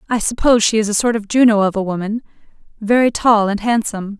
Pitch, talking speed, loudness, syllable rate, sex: 215 Hz, 200 wpm, -16 LUFS, 6.5 syllables/s, female